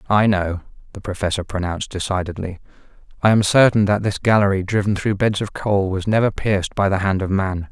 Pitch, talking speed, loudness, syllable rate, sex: 100 Hz, 195 wpm, -19 LUFS, 5.8 syllables/s, male